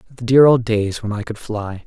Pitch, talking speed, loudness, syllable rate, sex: 110 Hz, 260 wpm, -17 LUFS, 4.8 syllables/s, male